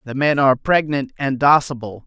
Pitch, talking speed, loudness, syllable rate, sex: 140 Hz, 175 wpm, -17 LUFS, 5.4 syllables/s, male